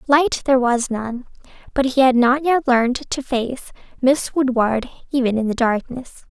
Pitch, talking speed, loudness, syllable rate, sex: 255 Hz, 170 wpm, -19 LUFS, 4.4 syllables/s, female